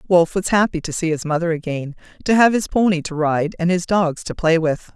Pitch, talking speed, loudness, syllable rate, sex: 170 Hz, 240 wpm, -19 LUFS, 5.6 syllables/s, female